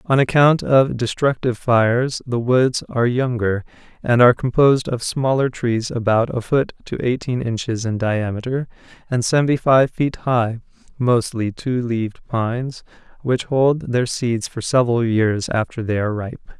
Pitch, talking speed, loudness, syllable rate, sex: 120 Hz, 155 wpm, -19 LUFS, 4.7 syllables/s, male